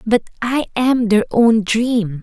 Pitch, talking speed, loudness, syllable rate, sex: 225 Hz, 160 wpm, -16 LUFS, 3.5 syllables/s, female